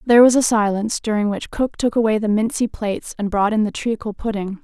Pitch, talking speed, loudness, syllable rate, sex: 215 Hz, 235 wpm, -19 LUFS, 6.0 syllables/s, female